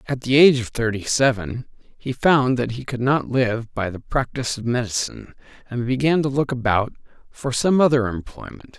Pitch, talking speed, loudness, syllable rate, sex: 125 Hz, 185 wpm, -21 LUFS, 5.1 syllables/s, male